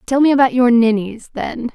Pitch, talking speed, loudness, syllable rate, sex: 240 Hz, 205 wpm, -15 LUFS, 5.2 syllables/s, female